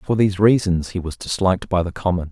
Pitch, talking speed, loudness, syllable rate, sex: 95 Hz, 235 wpm, -19 LUFS, 6.2 syllables/s, male